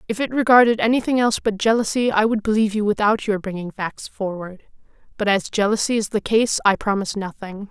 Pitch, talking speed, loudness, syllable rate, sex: 210 Hz, 195 wpm, -20 LUFS, 6.1 syllables/s, female